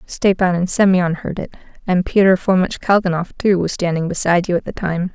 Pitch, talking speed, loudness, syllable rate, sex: 180 Hz, 200 wpm, -17 LUFS, 5.3 syllables/s, female